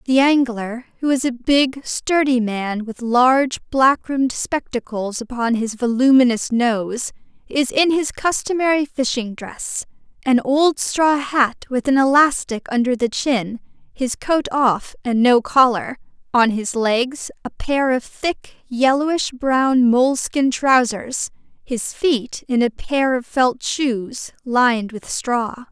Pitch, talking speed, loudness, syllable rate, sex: 255 Hz, 140 wpm, -18 LUFS, 3.7 syllables/s, female